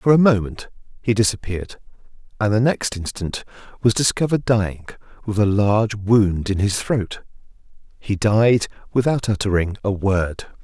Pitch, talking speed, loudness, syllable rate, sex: 105 Hz, 140 wpm, -20 LUFS, 4.9 syllables/s, male